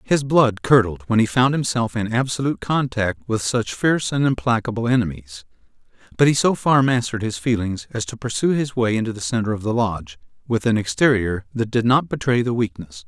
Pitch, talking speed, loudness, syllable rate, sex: 115 Hz, 195 wpm, -20 LUFS, 5.6 syllables/s, male